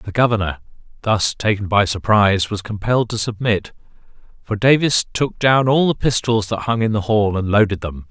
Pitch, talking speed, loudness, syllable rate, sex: 105 Hz, 185 wpm, -18 LUFS, 5.2 syllables/s, male